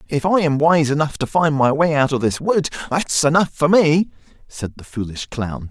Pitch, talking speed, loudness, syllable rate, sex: 150 Hz, 220 wpm, -18 LUFS, 4.9 syllables/s, male